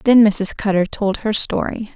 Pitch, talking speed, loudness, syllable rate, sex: 210 Hz, 185 wpm, -18 LUFS, 4.5 syllables/s, female